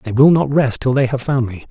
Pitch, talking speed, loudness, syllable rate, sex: 130 Hz, 315 wpm, -15 LUFS, 5.7 syllables/s, male